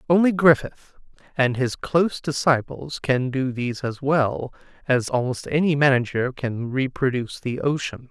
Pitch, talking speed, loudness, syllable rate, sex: 135 Hz, 140 wpm, -22 LUFS, 4.6 syllables/s, male